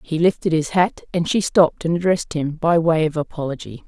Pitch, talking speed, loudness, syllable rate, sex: 160 Hz, 215 wpm, -19 LUFS, 5.7 syllables/s, female